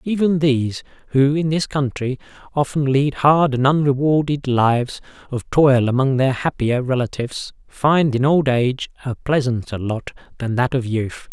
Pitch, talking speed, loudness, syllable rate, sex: 135 Hz, 155 wpm, -19 LUFS, 4.6 syllables/s, male